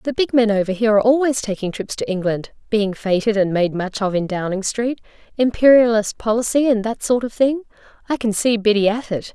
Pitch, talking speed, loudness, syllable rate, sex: 220 Hz, 200 wpm, -18 LUFS, 5.7 syllables/s, female